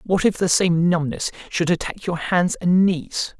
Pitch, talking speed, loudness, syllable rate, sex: 175 Hz, 195 wpm, -20 LUFS, 4.2 syllables/s, male